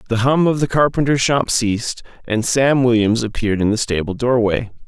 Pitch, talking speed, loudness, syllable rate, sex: 120 Hz, 185 wpm, -17 LUFS, 5.3 syllables/s, male